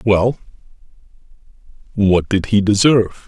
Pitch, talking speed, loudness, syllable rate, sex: 105 Hz, 75 wpm, -15 LUFS, 4.4 syllables/s, male